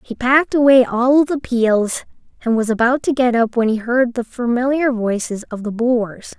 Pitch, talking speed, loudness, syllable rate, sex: 240 Hz, 195 wpm, -17 LUFS, 4.6 syllables/s, female